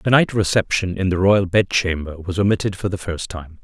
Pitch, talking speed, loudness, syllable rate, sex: 95 Hz, 215 wpm, -19 LUFS, 5.3 syllables/s, male